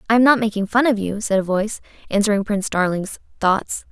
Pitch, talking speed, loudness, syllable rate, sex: 210 Hz, 215 wpm, -19 LUFS, 6.2 syllables/s, female